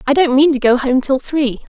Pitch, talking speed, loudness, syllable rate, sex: 270 Hz, 275 wpm, -14 LUFS, 5.4 syllables/s, female